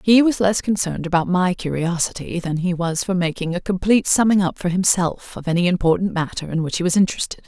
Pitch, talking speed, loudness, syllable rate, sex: 180 Hz, 215 wpm, -20 LUFS, 6.1 syllables/s, female